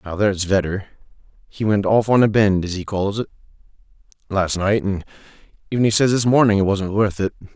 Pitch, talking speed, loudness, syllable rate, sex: 100 Hz, 200 wpm, -19 LUFS, 5.9 syllables/s, male